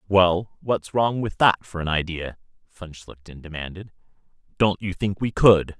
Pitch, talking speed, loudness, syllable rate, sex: 95 Hz, 165 wpm, -22 LUFS, 4.3 syllables/s, male